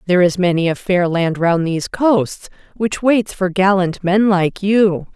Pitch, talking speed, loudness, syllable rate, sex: 185 Hz, 185 wpm, -16 LUFS, 4.2 syllables/s, female